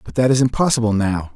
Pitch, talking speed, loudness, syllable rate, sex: 115 Hz, 220 wpm, -17 LUFS, 6.4 syllables/s, male